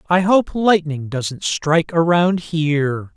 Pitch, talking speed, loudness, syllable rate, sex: 165 Hz, 135 wpm, -18 LUFS, 3.8 syllables/s, male